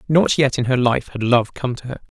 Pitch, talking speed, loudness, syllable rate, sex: 125 Hz, 275 wpm, -18 LUFS, 5.3 syllables/s, male